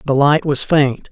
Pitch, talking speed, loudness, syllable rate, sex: 145 Hz, 215 wpm, -15 LUFS, 4.2 syllables/s, male